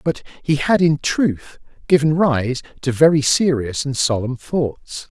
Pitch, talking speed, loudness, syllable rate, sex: 145 Hz, 150 wpm, -18 LUFS, 3.9 syllables/s, male